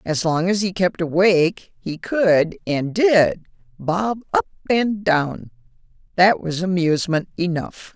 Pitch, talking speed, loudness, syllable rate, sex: 175 Hz, 135 wpm, -19 LUFS, 3.8 syllables/s, female